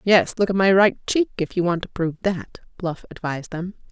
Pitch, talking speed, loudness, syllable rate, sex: 185 Hz, 230 wpm, -22 LUFS, 5.8 syllables/s, female